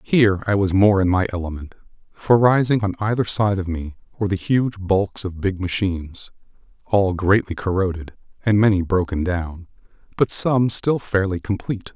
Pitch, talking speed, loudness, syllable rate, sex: 100 Hz, 165 wpm, -20 LUFS, 5.0 syllables/s, male